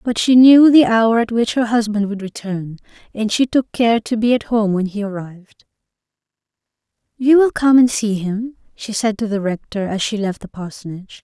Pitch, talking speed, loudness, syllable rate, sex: 220 Hz, 205 wpm, -16 LUFS, 5.1 syllables/s, female